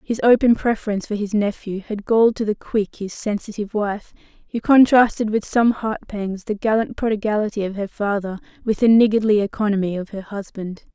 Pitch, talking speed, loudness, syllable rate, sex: 210 Hz, 180 wpm, -20 LUFS, 5.6 syllables/s, female